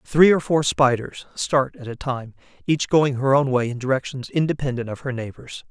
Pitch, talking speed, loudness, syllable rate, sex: 135 Hz, 200 wpm, -21 LUFS, 5.0 syllables/s, male